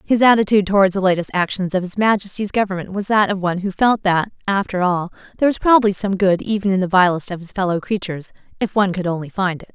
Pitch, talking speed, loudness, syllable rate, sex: 190 Hz, 235 wpm, -18 LUFS, 6.7 syllables/s, female